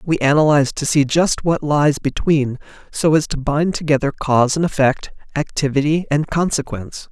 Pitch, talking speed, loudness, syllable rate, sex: 145 Hz, 160 wpm, -17 LUFS, 5.2 syllables/s, male